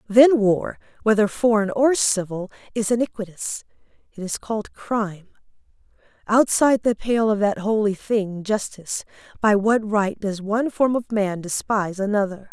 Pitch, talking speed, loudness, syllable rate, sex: 210 Hz, 145 wpm, -21 LUFS, 4.8 syllables/s, female